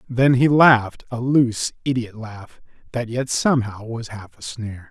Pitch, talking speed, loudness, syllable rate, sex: 120 Hz, 170 wpm, -20 LUFS, 4.5 syllables/s, male